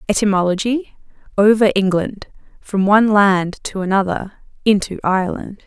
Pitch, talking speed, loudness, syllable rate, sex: 200 Hz, 105 wpm, -17 LUFS, 4.9 syllables/s, female